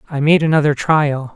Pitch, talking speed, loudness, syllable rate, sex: 150 Hz, 175 wpm, -15 LUFS, 5.2 syllables/s, male